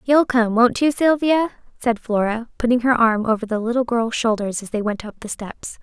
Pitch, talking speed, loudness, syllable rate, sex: 235 Hz, 215 wpm, -20 LUFS, 5.1 syllables/s, female